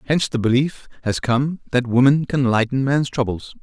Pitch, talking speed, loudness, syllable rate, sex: 130 Hz, 180 wpm, -19 LUFS, 5.1 syllables/s, male